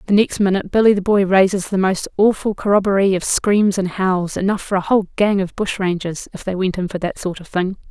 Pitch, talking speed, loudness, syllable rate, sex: 190 Hz, 245 wpm, -18 LUFS, 5.8 syllables/s, female